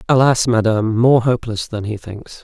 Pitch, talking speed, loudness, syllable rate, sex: 115 Hz, 175 wpm, -16 LUFS, 5.3 syllables/s, male